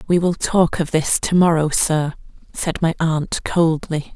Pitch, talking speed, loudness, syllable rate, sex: 165 Hz, 175 wpm, -18 LUFS, 3.9 syllables/s, female